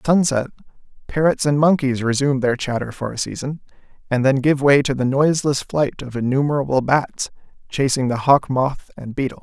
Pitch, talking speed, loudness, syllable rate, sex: 135 Hz, 180 wpm, -19 LUFS, 5.5 syllables/s, male